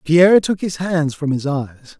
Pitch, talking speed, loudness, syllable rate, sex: 160 Hz, 210 wpm, -17 LUFS, 5.0 syllables/s, male